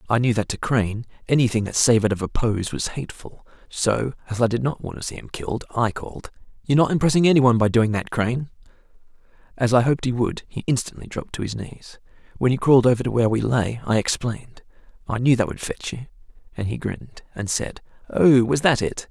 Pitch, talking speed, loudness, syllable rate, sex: 120 Hz, 220 wpm, -22 LUFS, 6.3 syllables/s, male